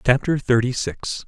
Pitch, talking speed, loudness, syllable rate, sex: 125 Hz, 140 wpm, -21 LUFS, 4.4 syllables/s, male